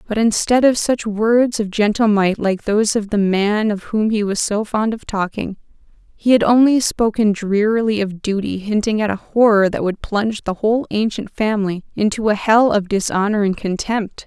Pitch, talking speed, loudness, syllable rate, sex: 210 Hz, 195 wpm, -17 LUFS, 4.9 syllables/s, female